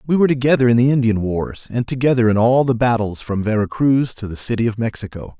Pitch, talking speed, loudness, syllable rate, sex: 120 Hz, 235 wpm, -17 LUFS, 6.2 syllables/s, male